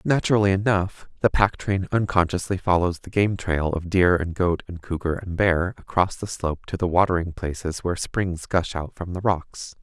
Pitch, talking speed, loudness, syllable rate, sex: 90 Hz, 195 wpm, -23 LUFS, 5.0 syllables/s, male